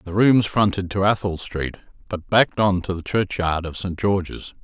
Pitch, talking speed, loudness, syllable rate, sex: 95 Hz, 195 wpm, -21 LUFS, 4.8 syllables/s, male